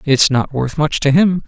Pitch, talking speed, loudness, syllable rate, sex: 145 Hz, 245 wpm, -15 LUFS, 4.4 syllables/s, male